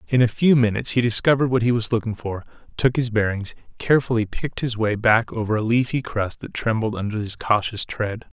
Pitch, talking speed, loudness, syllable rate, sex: 115 Hz, 210 wpm, -21 LUFS, 5.9 syllables/s, male